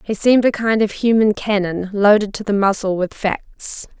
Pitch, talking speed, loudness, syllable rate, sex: 205 Hz, 195 wpm, -17 LUFS, 4.8 syllables/s, female